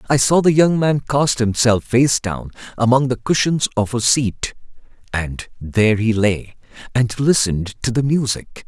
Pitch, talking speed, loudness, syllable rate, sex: 120 Hz, 165 wpm, -17 LUFS, 4.4 syllables/s, male